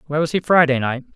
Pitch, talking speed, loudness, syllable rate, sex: 145 Hz, 260 wpm, -18 LUFS, 7.9 syllables/s, male